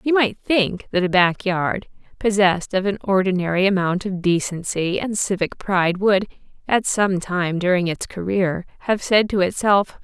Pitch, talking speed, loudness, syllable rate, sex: 190 Hz, 165 wpm, -20 LUFS, 4.6 syllables/s, female